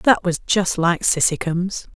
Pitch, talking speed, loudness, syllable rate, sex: 180 Hz, 155 wpm, -19 LUFS, 3.9 syllables/s, female